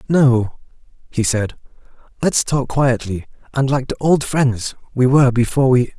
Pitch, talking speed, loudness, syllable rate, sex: 130 Hz, 150 wpm, -17 LUFS, 4.6 syllables/s, male